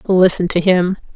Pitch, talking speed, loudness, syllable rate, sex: 180 Hz, 155 wpm, -15 LUFS, 4.4 syllables/s, female